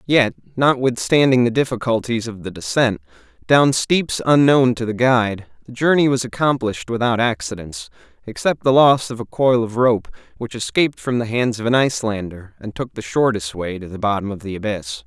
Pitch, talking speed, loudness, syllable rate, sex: 115 Hz, 185 wpm, -18 LUFS, 5.3 syllables/s, male